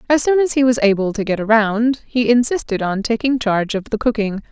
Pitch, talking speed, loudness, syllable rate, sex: 230 Hz, 225 wpm, -17 LUFS, 5.7 syllables/s, female